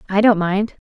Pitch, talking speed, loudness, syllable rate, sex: 200 Hz, 205 wpm, -17 LUFS, 4.9 syllables/s, female